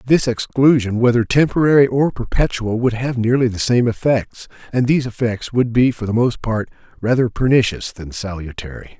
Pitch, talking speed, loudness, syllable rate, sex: 120 Hz, 165 wpm, -17 LUFS, 5.2 syllables/s, male